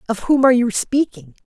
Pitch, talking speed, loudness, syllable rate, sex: 235 Hz, 205 wpm, -17 LUFS, 5.8 syllables/s, female